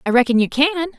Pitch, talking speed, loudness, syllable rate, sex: 280 Hz, 245 wpm, -17 LUFS, 6.3 syllables/s, female